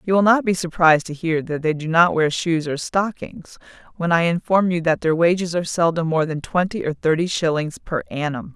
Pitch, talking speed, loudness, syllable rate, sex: 165 Hz, 225 wpm, -20 LUFS, 5.3 syllables/s, female